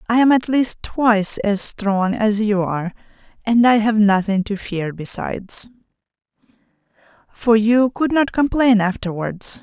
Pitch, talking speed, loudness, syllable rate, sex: 215 Hz, 145 wpm, -18 LUFS, 4.3 syllables/s, female